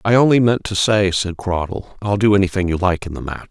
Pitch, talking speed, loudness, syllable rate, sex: 95 Hz, 255 wpm, -17 LUFS, 6.2 syllables/s, male